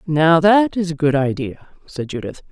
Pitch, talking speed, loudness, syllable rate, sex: 160 Hz, 190 wpm, -17 LUFS, 4.7 syllables/s, female